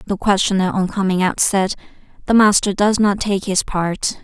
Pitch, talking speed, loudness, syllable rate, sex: 195 Hz, 185 wpm, -17 LUFS, 4.8 syllables/s, female